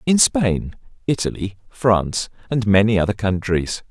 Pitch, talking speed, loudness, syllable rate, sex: 105 Hz, 125 wpm, -20 LUFS, 4.4 syllables/s, male